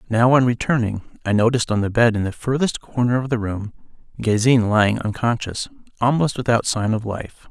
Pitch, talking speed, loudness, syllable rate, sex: 115 Hz, 185 wpm, -20 LUFS, 5.4 syllables/s, male